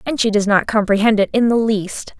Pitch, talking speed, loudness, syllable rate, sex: 215 Hz, 245 wpm, -16 LUFS, 5.5 syllables/s, female